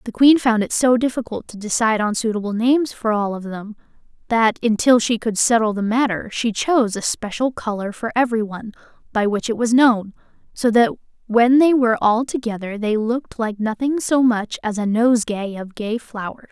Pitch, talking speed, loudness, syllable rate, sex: 225 Hz, 195 wpm, -19 LUFS, 5.2 syllables/s, female